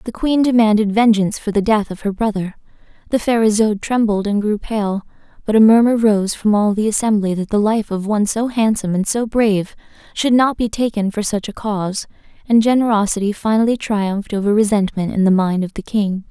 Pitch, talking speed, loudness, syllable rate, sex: 210 Hz, 200 wpm, -17 LUFS, 5.7 syllables/s, female